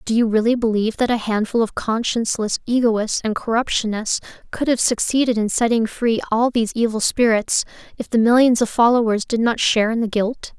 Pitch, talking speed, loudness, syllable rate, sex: 225 Hz, 185 wpm, -19 LUFS, 5.6 syllables/s, female